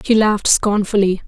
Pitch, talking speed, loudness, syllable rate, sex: 205 Hz, 140 wpm, -15 LUFS, 5.3 syllables/s, female